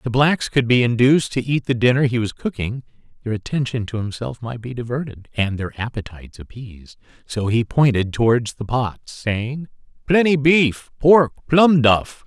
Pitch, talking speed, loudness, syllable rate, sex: 125 Hz, 175 wpm, -19 LUFS, 4.9 syllables/s, male